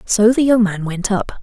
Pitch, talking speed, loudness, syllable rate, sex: 210 Hz, 250 wpm, -16 LUFS, 4.8 syllables/s, female